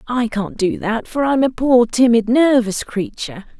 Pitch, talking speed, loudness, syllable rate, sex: 230 Hz, 200 wpm, -16 LUFS, 4.8 syllables/s, female